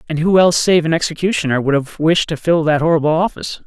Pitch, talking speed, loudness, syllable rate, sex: 160 Hz, 230 wpm, -15 LUFS, 6.6 syllables/s, male